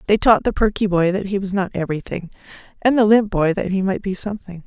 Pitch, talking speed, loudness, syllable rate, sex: 195 Hz, 245 wpm, -19 LUFS, 6.3 syllables/s, female